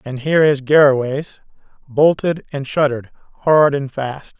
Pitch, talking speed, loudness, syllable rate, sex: 140 Hz, 135 wpm, -16 LUFS, 4.7 syllables/s, male